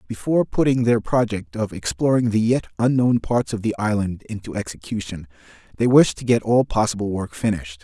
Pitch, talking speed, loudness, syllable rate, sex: 110 Hz, 175 wpm, -21 LUFS, 5.6 syllables/s, male